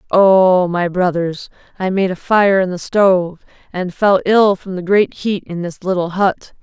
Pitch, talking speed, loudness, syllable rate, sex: 185 Hz, 190 wpm, -15 LUFS, 4.2 syllables/s, female